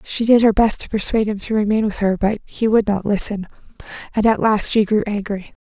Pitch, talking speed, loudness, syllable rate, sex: 210 Hz, 235 wpm, -18 LUFS, 5.7 syllables/s, female